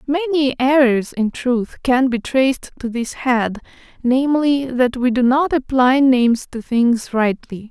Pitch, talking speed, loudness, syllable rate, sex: 255 Hz, 155 wpm, -17 LUFS, 4.2 syllables/s, female